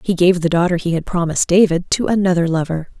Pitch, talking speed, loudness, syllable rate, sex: 175 Hz, 220 wpm, -16 LUFS, 6.4 syllables/s, female